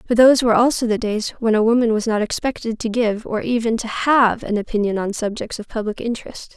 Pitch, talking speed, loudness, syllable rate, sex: 225 Hz, 230 wpm, -19 LUFS, 6.0 syllables/s, female